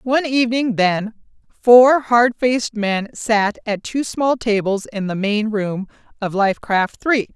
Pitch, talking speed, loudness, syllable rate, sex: 225 Hz, 155 wpm, -18 LUFS, 4.0 syllables/s, female